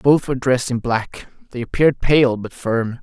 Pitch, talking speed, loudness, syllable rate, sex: 125 Hz, 200 wpm, -18 LUFS, 5.1 syllables/s, male